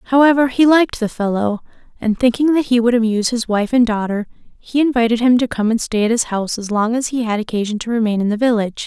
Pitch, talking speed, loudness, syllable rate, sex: 230 Hz, 245 wpm, -16 LUFS, 6.5 syllables/s, female